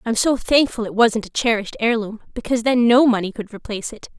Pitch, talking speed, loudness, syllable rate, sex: 225 Hz, 215 wpm, -19 LUFS, 6.3 syllables/s, female